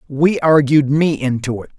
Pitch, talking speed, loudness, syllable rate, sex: 145 Hz, 170 wpm, -15 LUFS, 4.6 syllables/s, male